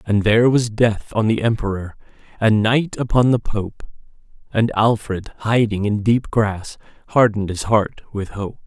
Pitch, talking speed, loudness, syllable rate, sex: 110 Hz, 160 wpm, -19 LUFS, 4.5 syllables/s, male